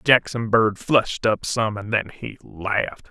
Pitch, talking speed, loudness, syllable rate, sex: 110 Hz, 175 wpm, -21 LUFS, 4.2 syllables/s, male